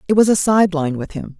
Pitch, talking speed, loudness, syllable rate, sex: 180 Hz, 260 wpm, -16 LUFS, 7.4 syllables/s, female